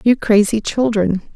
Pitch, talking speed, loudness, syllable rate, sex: 215 Hz, 135 wpm, -16 LUFS, 4.3 syllables/s, female